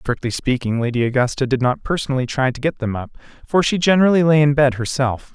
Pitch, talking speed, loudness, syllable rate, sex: 135 Hz, 215 wpm, -18 LUFS, 6.2 syllables/s, male